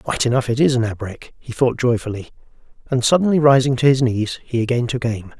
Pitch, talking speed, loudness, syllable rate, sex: 125 Hz, 210 wpm, -18 LUFS, 5.9 syllables/s, male